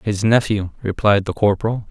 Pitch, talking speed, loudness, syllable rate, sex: 105 Hz, 155 wpm, -18 LUFS, 5.2 syllables/s, male